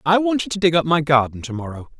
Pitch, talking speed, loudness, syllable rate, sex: 155 Hz, 300 wpm, -19 LUFS, 6.5 syllables/s, male